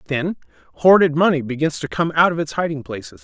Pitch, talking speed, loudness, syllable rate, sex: 155 Hz, 205 wpm, -18 LUFS, 6.3 syllables/s, male